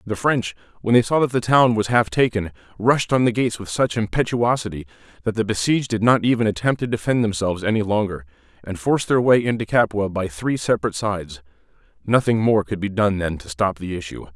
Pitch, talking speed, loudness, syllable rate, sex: 105 Hz, 210 wpm, -20 LUFS, 6.0 syllables/s, male